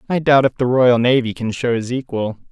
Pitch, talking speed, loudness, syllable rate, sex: 125 Hz, 240 wpm, -17 LUFS, 5.4 syllables/s, male